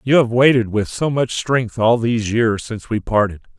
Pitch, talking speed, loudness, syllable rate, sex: 115 Hz, 215 wpm, -17 LUFS, 5.1 syllables/s, male